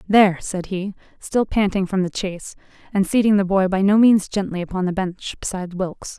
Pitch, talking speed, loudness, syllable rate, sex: 195 Hz, 205 wpm, -20 LUFS, 5.6 syllables/s, female